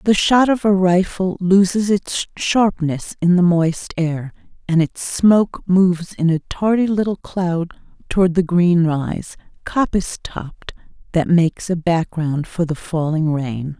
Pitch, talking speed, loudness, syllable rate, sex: 175 Hz, 150 wpm, -18 LUFS, 4.0 syllables/s, female